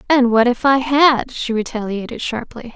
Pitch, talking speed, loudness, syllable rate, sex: 245 Hz, 175 wpm, -17 LUFS, 4.7 syllables/s, female